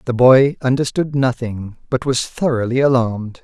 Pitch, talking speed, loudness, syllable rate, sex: 125 Hz, 140 wpm, -17 LUFS, 4.8 syllables/s, male